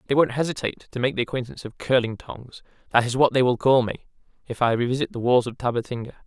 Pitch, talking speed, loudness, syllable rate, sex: 125 Hz, 210 wpm, -23 LUFS, 6.8 syllables/s, male